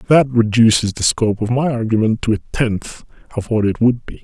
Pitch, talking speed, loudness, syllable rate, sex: 115 Hz, 210 wpm, -16 LUFS, 5.3 syllables/s, male